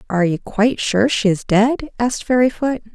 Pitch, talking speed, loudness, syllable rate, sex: 220 Hz, 185 wpm, -17 LUFS, 5.4 syllables/s, female